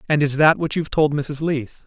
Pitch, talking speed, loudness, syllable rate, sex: 150 Hz, 260 wpm, -19 LUFS, 5.3 syllables/s, male